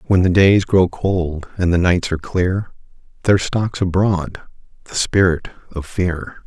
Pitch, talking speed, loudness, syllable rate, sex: 90 Hz, 160 wpm, -18 LUFS, 4.3 syllables/s, male